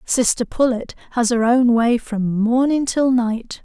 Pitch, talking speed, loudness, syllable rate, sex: 240 Hz, 165 wpm, -18 LUFS, 3.9 syllables/s, female